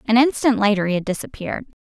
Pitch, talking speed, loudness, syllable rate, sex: 220 Hz, 195 wpm, -20 LUFS, 7.2 syllables/s, female